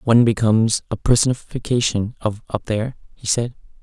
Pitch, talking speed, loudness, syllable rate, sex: 115 Hz, 125 wpm, -20 LUFS, 5.5 syllables/s, male